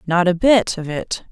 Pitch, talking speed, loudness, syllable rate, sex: 185 Hz, 230 wpm, -17 LUFS, 4.4 syllables/s, female